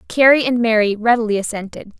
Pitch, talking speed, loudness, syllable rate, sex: 225 Hz, 150 wpm, -15 LUFS, 6.2 syllables/s, female